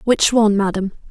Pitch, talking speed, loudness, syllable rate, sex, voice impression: 210 Hz, 165 wpm, -16 LUFS, 5.8 syllables/s, female, feminine, slightly young, slightly adult-like, relaxed, weak, slightly soft, slightly muffled, slightly intellectual, reassuring, kind, modest